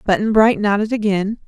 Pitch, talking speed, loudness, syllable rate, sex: 210 Hz, 160 wpm, -16 LUFS, 5.3 syllables/s, female